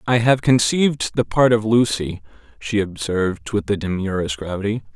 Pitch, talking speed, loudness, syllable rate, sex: 105 Hz, 160 wpm, -19 LUFS, 5.1 syllables/s, male